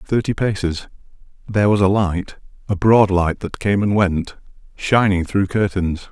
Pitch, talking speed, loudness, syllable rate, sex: 100 Hz, 145 wpm, -18 LUFS, 4.4 syllables/s, male